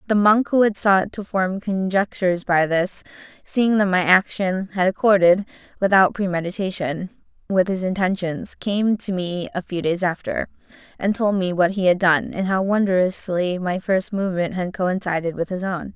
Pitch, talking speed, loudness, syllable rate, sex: 190 Hz, 175 wpm, -20 LUFS, 4.7 syllables/s, female